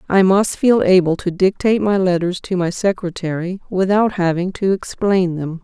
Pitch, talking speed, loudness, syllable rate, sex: 185 Hz, 170 wpm, -17 LUFS, 4.8 syllables/s, female